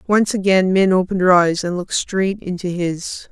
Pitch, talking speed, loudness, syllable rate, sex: 185 Hz, 200 wpm, -17 LUFS, 5.1 syllables/s, female